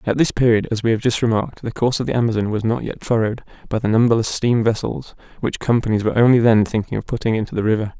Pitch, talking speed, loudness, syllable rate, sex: 115 Hz, 250 wpm, -19 LUFS, 7.1 syllables/s, male